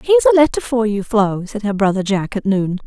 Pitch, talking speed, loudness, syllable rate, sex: 220 Hz, 250 wpm, -17 LUFS, 6.0 syllables/s, female